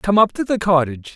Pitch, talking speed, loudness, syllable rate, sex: 185 Hz, 260 wpm, -18 LUFS, 6.3 syllables/s, male